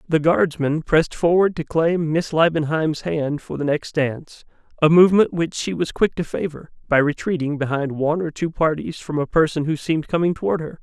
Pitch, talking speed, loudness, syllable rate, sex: 160 Hz, 200 wpm, -20 LUFS, 5.3 syllables/s, male